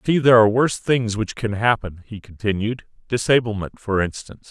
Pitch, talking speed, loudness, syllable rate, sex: 110 Hz, 185 wpm, -20 LUFS, 6.0 syllables/s, male